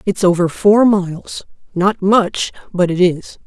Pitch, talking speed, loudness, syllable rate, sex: 190 Hz, 140 wpm, -15 LUFS, 3.9 syllables/s, female